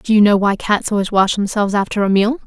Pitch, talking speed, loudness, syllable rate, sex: 205 Hz, 270 wpm, -15 LUFS, 6.3 syllables/s, female